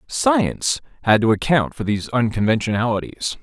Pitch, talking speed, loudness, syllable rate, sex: 120 Hz, 125 wpm, -19 LUFS, 5.3 syllables/s, male